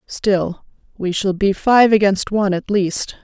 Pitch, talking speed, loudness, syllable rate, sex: 200 Hz, 165 wpm, -17 LUFS, 4.1 syllables/s, female